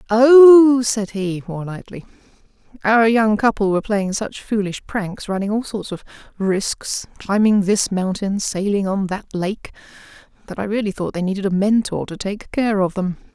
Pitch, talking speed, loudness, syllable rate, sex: 205 Hz, 170 wpm, -18 LUFS, 4.5 syllables/s, female